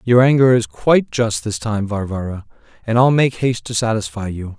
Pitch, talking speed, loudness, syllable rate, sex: 115 Hz, 195 wpm, -17 LUFS, 5.4 syllables/s, male